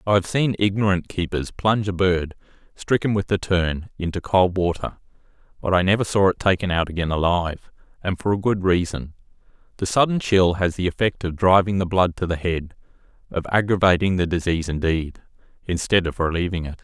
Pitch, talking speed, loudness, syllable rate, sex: 90 Hz, 180 wpm, -21 LUFS, 5.6 syllables/s, male